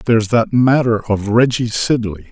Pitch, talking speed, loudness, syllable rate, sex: 115 Hz, 155 wpm, -15 LUFS, 4.9 syllables/s, male